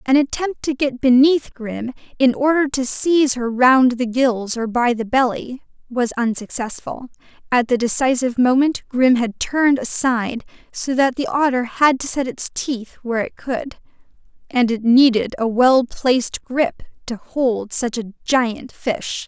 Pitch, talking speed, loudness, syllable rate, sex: 250 Hz, 165 wpm, -18 LUFS, 4.3 syllables/s, female